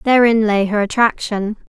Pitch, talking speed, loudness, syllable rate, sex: 215 Hz, 140 wpm, -16 LUFS, 4.7 syllables/s, female